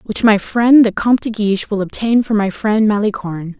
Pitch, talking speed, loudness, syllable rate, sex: 210 Hz, 215 wpm, -15 LUFS, 5.4 syllables/s, female